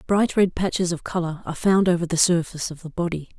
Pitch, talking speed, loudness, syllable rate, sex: 175 Hz, 230 wpm, -22 LUFS, 6.4 syllables/s, female